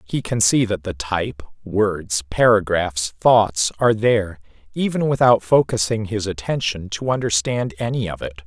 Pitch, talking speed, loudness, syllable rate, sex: 105 Hz, 150 wpm, -19 LUFS, 4.6 syllables/s, male